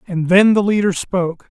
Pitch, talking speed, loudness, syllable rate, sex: 190 Hz, 190 wpm, -15 LUFS, 5.1 syllables/s, male